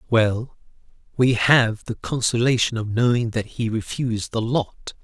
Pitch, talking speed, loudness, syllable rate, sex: 115 Hz, 145 wpm, -21 LUFS, 4.3 syllables/s, male